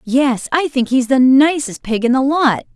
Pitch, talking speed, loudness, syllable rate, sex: 265 Hz, 240 wpm, -15 LUFS, 4.7 syllables/s, female